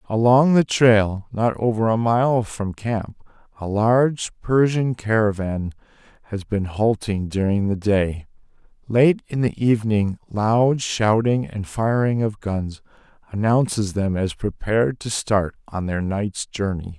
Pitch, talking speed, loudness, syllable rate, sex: 110 Hz, 140 wpm, -21 LUFS, 3.9 syllables/s, male